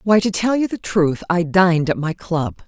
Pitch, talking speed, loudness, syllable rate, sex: 175 Hz, 245 wpm, -18 LUFS, 4.8 syllables/s, female